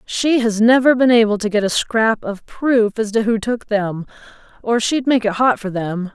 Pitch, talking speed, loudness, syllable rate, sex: 220 Hz, 225 wpm, -17 LUFS, 4.6 syllables/s, female